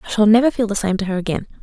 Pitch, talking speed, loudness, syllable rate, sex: 210 Hz, 335 wpm, -17 LUFS, 8.2 syllables/s, female